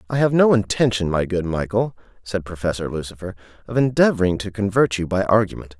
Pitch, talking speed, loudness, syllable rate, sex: 100 Hz, 175 wpm, -20 LUFS, 6.0 syllables/s, male